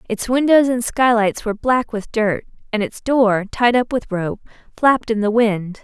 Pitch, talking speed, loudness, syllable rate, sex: 225 Hz, 195 wpm, -18 LUFS, 4.6 syllables/s, female